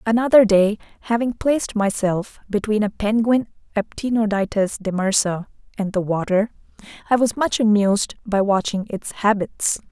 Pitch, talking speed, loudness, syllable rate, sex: 210 Hz, 125 wpm, -20 LUFS, 4.2 syllables/s, female